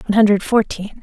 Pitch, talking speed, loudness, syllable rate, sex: 210 Hz, 175 wpm, -16 LUFS, 6.9 syllables/s, female